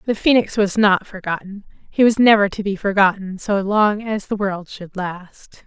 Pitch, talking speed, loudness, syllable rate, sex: 200 Hz, 190 wpm, -18 LUFS, 4.6 syllables/s, female